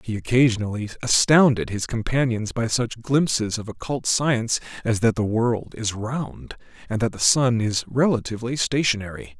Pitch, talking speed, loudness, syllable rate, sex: 115 Hz, 155 wpm, -22 LUFS, 4.9 syllables/s, male